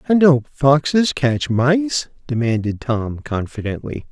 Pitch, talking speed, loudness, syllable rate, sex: 135 Hz, 115 wpm, -18 LUFS, 3.7 syllables/s, male